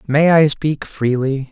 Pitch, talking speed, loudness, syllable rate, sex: 145 Hz, 160 wpm, -16 LUFS, 3.7 syllables/s, male